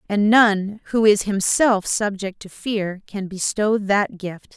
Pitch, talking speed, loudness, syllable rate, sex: 205 Hz, 160 wpm, -20 LUFS, 3.6 syllables/s, female